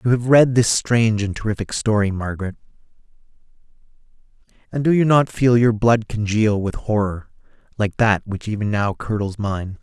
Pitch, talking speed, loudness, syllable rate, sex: 110 Hz, 160 wpm, -19 LUFS, 5.1 syllables/s, male